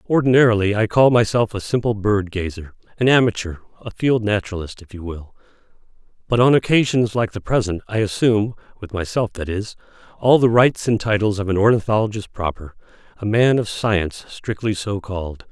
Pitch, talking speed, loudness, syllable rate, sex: 105 Hz, 160 wpm, -19 LUFS, 5.6 syllables/s, male